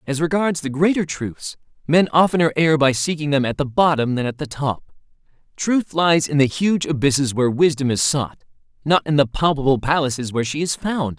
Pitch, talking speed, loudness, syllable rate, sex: 145 Hz, 200 wpm, -19 LUFS, 5.4 syllables/s, male